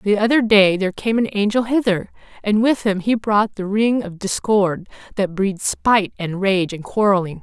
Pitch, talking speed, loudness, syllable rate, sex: 205 Hz, 195 wpm, -18 LUFS, 4.8 syllables/s, female